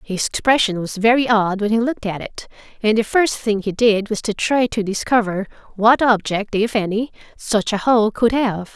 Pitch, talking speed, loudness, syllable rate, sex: 215 Hz, 205 wpm, -18 LUFS, 4.9 syllables/s, female